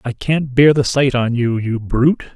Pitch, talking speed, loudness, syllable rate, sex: 130 Hz, 230 wpm, -16 LUFS, 4.7 syllables/s, male